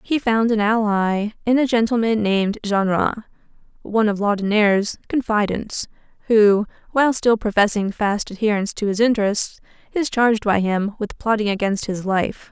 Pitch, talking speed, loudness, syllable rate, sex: 215 Hz, 150 wpm, -19 LUFS, 5.0 syllables/s, female